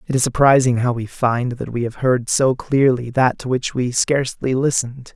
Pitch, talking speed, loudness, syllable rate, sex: 125 Hz, 210 wpm, -18 LUFS, 5.0 syllables/s, male